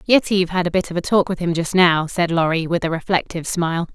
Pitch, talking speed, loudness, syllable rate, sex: 175 Hz, 260 wpm, -19 LUFS, 6.5 syllables/s, female